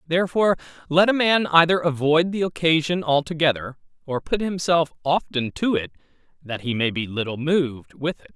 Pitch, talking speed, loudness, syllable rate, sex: 155 Hz, 165 wpm, -21 LUFS, 5.3 syllables/s, male